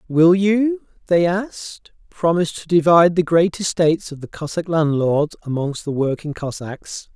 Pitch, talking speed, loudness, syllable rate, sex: 165 Hz, 150 wpm, -18 LUFS, 4.7 syllables/s, male